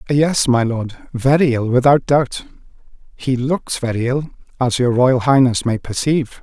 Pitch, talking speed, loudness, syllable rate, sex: 130 Hz, 160 wpm, -17 LUFS, 4.4 syllables/s, male